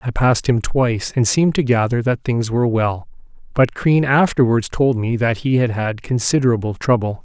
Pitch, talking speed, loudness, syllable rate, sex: 120 Hz, 190 wpm, -17 LUFS, 5.3 syllables/s, male